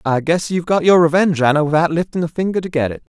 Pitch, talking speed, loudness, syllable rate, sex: 165 Hz, 265 wpm, -16 LUFS, 7.1 syllables/s, male